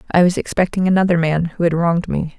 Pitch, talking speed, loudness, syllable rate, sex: 170 Hz, 225 wpm, -17 LUFS, 6.4 syllables/s, female